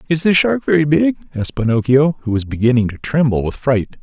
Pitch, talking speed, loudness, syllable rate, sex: 135 Hz, 210 wpm, -16 LUFS, 5.9 syllables/s, male